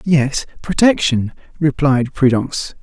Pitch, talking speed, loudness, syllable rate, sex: 145 Hz, 85 wpm, -16 LUFS, 4.0 syllables/s, male